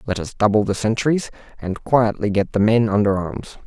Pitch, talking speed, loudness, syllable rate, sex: 105 Hz, 195 wpm, -19 LUFS, 5.1 syllables/s, male